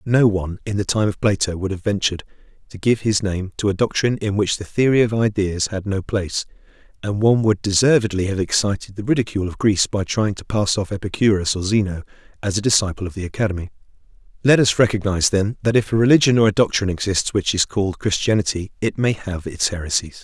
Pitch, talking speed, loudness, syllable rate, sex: 100 Hz, 210 wpm, -19 LUFS, 6.4 syllables/s, male